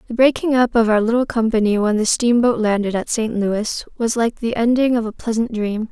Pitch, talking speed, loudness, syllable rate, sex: 225 Hz, 225 wpm, -18 LUFS, 5.4 syllables/s, female